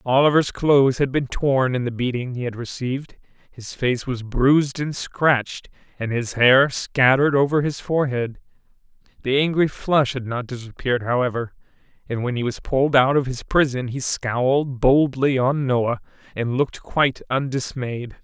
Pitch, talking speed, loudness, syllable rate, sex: 130 Hz, 160 wpm, -21 LUFS, 4.9 syllables/s, male